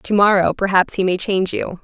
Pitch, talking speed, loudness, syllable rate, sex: 190 Hz, 230 wpm, -17 LUFS, 5.7 syllables/s, female